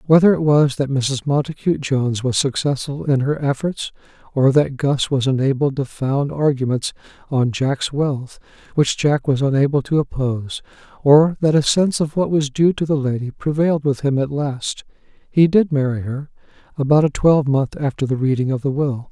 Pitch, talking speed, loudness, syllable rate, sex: 140 Hz, 180 wpm, -18 LUFS, 5.1 syllables/s, male